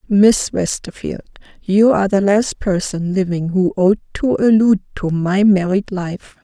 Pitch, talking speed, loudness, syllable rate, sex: 195 Hz, 150 wpm, -16 LUFS, 4.3 syllables/s, female